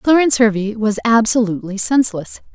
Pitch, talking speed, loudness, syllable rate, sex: 225 Hz, 120 wpm, -15 LUFS, 6.0 syllables/s, female